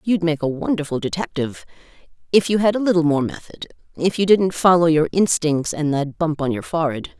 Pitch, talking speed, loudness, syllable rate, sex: 165 Hz, 185 wpm, -19 LUFS, 5.7 syllables/s, female